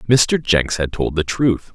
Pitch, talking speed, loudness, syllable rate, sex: 100 Hz, 205 wpm, -18 LUFS, 3.5 syllables/s, male